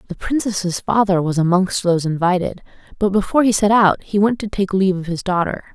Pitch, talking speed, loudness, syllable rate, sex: 190 Hz, 210 wpm, -18 LUFS, 5.8 syllables/s, female